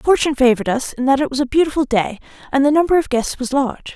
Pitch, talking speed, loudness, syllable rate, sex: 270 Hz, 260 wpm, -17 LUFS, 7.0 syllables/s, female